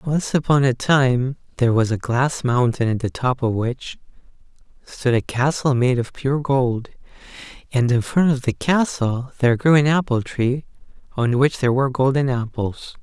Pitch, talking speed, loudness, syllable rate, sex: 130 Hz, 175 wpm, -20 LUFS, 4.7 syllables/s, male